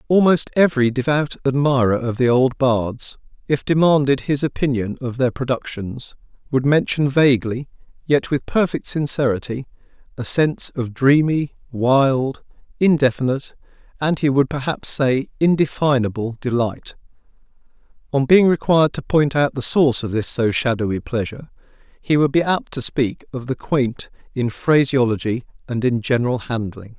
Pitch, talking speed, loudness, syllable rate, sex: 135 Hz, 140 wpm, -19 LUFS, 4.9 syllables/s, male